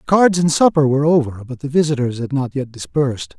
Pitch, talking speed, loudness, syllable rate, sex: 140 Hz, 215 wpm, -17 LUFS, 5.8 syllables/s, male